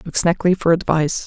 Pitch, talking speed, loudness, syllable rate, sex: 170 Hz, 145 wpm, -18 LUFS, 6.5 syllables/s, female